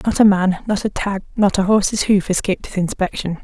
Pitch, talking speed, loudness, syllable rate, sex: 195 Hz, 225 wpm, -18 LUFS, 5.8 syllables/s, female